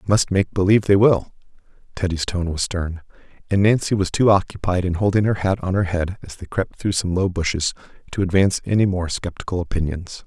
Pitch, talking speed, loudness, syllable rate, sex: 95 Hz, 205 wpm, -20 LUFS, 5.8 syllables/s, male